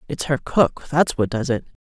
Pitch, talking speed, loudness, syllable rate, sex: 135 Hz, 230 wpm, -21 LUFS, 4.7 syllables/s, female